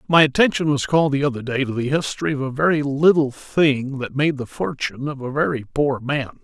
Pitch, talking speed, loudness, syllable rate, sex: 140 Hz, 225 wpm, -20 LUFS, 5.7 syllables/s, male